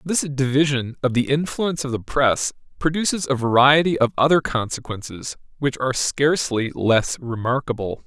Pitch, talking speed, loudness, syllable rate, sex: 130 Hz, 140 wpm, -21 LUFS, 5.0 syllables/s, male